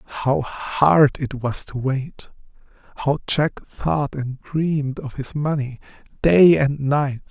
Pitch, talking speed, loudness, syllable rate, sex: 140 Hz, 140 wpm, -20 LUFS, 3.5 syllables/s, male